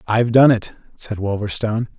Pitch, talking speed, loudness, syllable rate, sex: 110 Hz, 150 wpm, -18 LUFS, 5.7 syllables/s, male